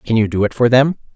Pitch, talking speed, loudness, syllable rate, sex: 120 Hz, 315 wpm, -15 LUFS, 6.5 syllables/s, male